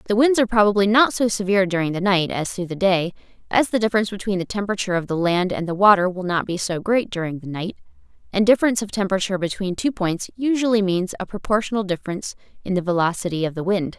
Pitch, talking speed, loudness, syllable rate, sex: 195 Hz, 225 wpm, -21 LUFS, 7.0 syllables/s, female